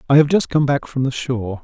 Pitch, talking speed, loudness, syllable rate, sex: 135 Hz, 295 wpm, -18 LUFS, 6.2 syllables/s, male